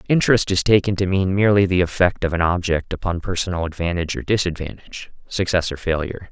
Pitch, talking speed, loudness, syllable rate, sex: 90 Hz, 180 wpm, -20 LUFS, 6.5 syllables/s, male